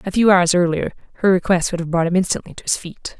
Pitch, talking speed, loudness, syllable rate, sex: 180 Hz, 265 wpm, -18 LUFS, 6.6 syllables/s, female